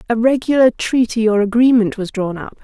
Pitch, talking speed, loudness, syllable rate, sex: 230 Hz, 180 wpm, -15 LUFS, 5.4 syllables/s, female